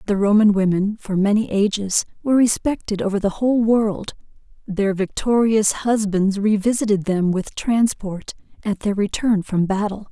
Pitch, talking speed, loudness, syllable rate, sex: 205 Hz, 150 wpm, -19 LUFS, 4.7 syllables/s, female